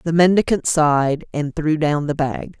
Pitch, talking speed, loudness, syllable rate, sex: 155 Hz, 185 wpm, -18 LUFS, 4.6 syllables/s, female